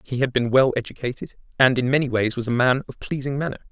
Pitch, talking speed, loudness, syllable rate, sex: 130 Hz, 240 wpm, -22 LUFS, 6.5 syllables/s, male